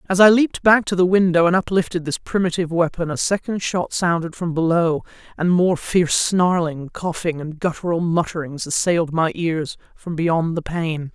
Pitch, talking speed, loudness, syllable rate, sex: 170 Hz, 180 wpm, -19 LUFS, 5.0 syllables/s, female